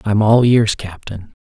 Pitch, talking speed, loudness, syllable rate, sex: 105 Hz, 165 wpm, -14 LUFS, 4.0 syllables/s, male